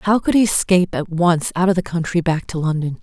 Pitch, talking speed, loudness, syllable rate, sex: 170 Hz, 240 wpm, -18 LUFS, 5.8 syllables/s, female